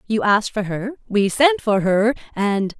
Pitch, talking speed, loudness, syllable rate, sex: 215 Hz, 195 wpm, -19 LUFS, 4.5 syllables/s, female